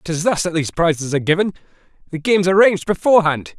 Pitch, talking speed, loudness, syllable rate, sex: 170 Hz, 185 wpm, -17 LUFS, 7.3 syllables/s, male